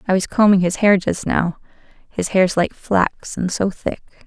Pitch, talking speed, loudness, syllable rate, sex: 190 Hz, 195 wpm, -18 LUFS, 4.4 syllables/s, female